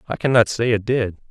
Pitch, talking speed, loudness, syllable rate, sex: 115 Hz, 230 wpm, -19 LUFS, 5.9 syllables/s, male